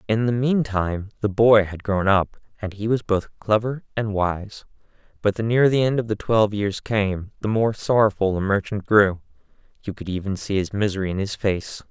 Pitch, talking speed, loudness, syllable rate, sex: 105 Hz, 200 wpm, -22 LUFS, 5.1 syllables/s, male